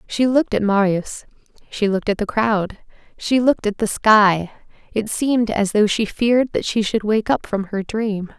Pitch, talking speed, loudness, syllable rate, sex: 215 Hz, 200 wpm, -19 LUFS, 4.8 syllables/s, female